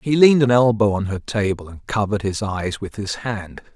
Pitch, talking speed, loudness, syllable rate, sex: 105 Hz, 225 wpm, -20 LUFS, 5.3 syllables/s, male